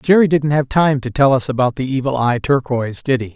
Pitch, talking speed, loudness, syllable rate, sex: 135 Hz, 250 wpm, -16 LUFS, 5.7 syllables/s, male